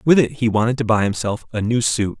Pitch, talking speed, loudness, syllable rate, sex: 115 Hz, 275 wpm, -19 LUFS, 6.0 syllables/s, male